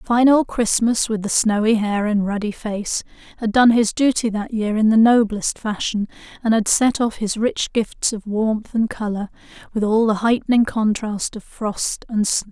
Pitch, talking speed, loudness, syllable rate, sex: 220 Hz, 190 wpm, -19 LUFS, 4.4 syllables/s, female